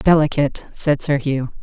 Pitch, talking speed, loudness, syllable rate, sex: 145 Hz, 150 wpm, -19 LUFS, 4.7 syllables/s, female